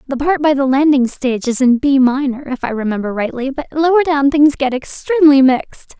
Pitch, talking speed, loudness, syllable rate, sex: 275 Hz, 210 wpm, -14 LUFS, 5.6 syllables/s, female